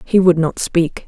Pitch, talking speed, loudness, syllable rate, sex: 170 Hz, 225 wpm, -16 LUFS, 4.1 syllables/s, female